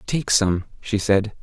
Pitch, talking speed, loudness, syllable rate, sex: 105 Hz, 170 wpm, -21 LUFS, 3.7 syllables/s, male